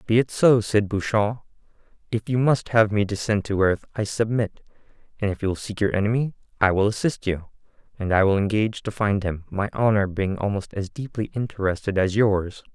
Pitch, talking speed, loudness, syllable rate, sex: 105 Hz, 200 wpm, -23 LUFS, 5.4 syllables/s, male